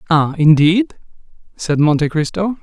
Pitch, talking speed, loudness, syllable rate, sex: 165 Hz, 115 wpm, -15 LUFS, 4.6 syllables/s, male